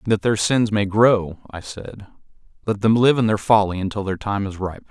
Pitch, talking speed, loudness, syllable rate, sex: 105 Hz, 230 wpm, -19 LUFS, 5.2 syllables/s, male